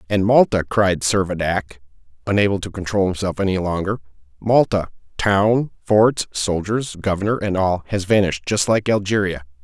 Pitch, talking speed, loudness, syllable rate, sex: 95 Hz, 125 wpm, -19 LUFS, 5.0 syllables/s, male